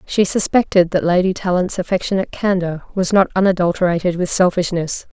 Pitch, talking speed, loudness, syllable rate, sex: 180 Hz, 140 wpm, -17 LUFS, 5.9 syllables/s, female